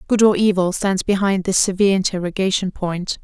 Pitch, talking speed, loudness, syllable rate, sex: 190 Hz, 165 wpm, -18 LUFS, 5.6 syllables/s, female